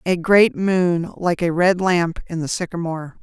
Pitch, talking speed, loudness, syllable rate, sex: 175 Hz, 185 wpm, -19 LUFS, 4.3 syllables/s, female